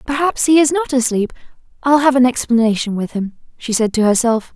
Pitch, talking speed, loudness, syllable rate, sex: 250 Hz, 200 wpm, -16 LUFS, 5.6 syllables/s, female